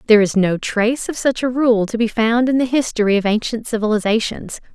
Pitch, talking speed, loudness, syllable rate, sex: 225 Hz, 215 wpm, -17 LUFS, 5.8 syllables/s, female